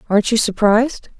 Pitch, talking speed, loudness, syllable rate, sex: 220 Hz, 150 wpm, -16 LUFS, 6.5 syllables/s, female